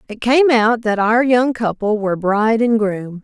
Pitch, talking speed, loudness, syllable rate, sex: 225 Hz, 205 wpm, -16 LUFS, 4.6 syllables/s, female